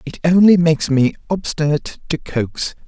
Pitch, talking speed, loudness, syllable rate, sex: 155 Hz, 145 wpm, -17 LUFS, 4.9 syllables/s, male